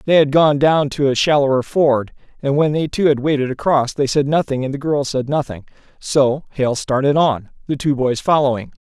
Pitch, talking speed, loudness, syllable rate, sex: 140 Hz, 205 wpm, -17 LUFS, 5.1 syllables/s, male